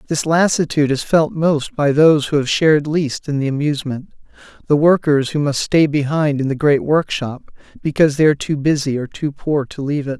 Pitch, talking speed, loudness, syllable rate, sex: 145 Hz, 205 wpm, -17 LUFS, 5.6 syllables/s, male